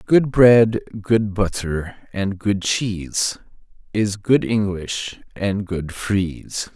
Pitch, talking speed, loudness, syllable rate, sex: 100 Hz, 115 wpm, -20 LUFS, 3.0 syllables/s, male